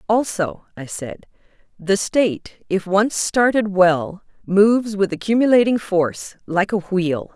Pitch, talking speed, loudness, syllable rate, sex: 195 Hz, 130 wpm, -19 LUFS, 4.0 syllables/s, female